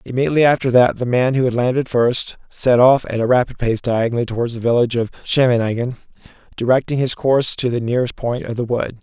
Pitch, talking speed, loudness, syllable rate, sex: 125 Hz, 205 wpm, -17 LUFS, 6.5 syllables/s, male